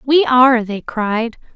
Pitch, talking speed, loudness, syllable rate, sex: 245 Hz, 155 wpm, -15 LUFS, 3.9 syllables/s, female